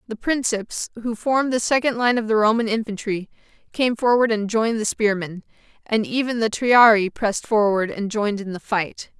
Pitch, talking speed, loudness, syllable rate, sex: 220 Hz, 185 wpm, -20 LUFS, 5.4 syllables/s, female